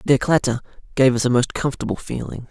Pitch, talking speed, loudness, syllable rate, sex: 130 Hz, 190 wpm, -20 LUFS, 6.4 syllables/s, male